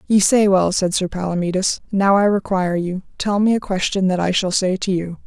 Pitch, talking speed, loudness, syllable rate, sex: 190 Hz, 230 wpm, -18 LUFS, 5.4 syllables/s, female